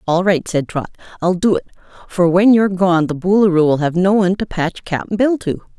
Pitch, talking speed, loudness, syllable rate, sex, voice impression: 180 Hz, 230 wpm, -16 LUFS, 5.4 syllables/s, female, very feminine, very middle-aged, slightly thin, tensed, powerful, slightly dark, hard, clear, fluent, cool, very intellectual, refreshing, very sincere, calm, friendly, reassuring, unique, elegant, wild, slightly sweet, lively, strict, slightly intense, slightly sharp